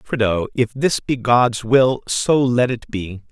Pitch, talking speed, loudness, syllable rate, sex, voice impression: 120 Hz, 180 wpm, -18 LUFS, 3.7 syllables/s, male, masculine, middle-aged, thick, tensed, slightly hard, slightly halting, slightly cool, calm, mature, slightly friendly, wild, lively, slightly strict